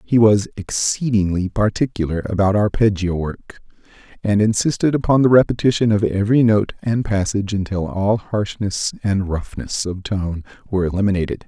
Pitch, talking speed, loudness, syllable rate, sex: 105 Hz, 135 wpm, -19 LUFS, 5.2 syllables/s, male